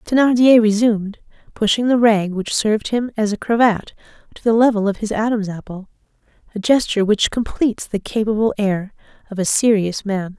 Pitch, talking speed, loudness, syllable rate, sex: 215 Hz, 170 wpm, -17 LUFS, 5.5 syllables/s, female